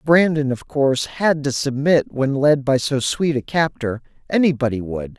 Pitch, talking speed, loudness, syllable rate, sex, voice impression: 140 Hz, 160 wpm, -19 LUFS, 4.6 syllables/s, male, masculine, adult-like, slightly thick, clear, slightly refreshing, sincere, slightly lively